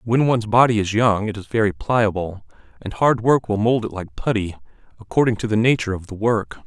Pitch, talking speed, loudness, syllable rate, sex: 110 Hz, 215 wpm, -20 LUFS, 5.7 syllables/s, male